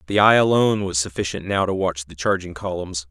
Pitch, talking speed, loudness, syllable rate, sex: 90 Hz, 215 wpm, -20 LUFS, 5.8 syllables/s, male